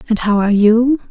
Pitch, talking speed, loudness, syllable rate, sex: 220 Hz, 215 wpm, -13 LUFS, 5.9 syllables/s, female